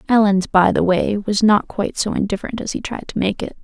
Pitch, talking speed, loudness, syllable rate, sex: 205 Hz, 250 wpm, -18 LUFS, 5.8 syllables/s, female